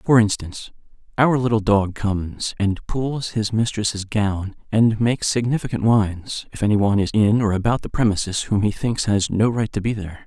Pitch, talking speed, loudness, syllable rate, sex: 110 Hz, 195 wpm, -20 LUFS, 5.2 syllables/s, male